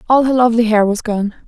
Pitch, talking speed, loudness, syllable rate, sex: 230 Hz, 245 wpm, -14 LUFS, 6.7 syllables/s, female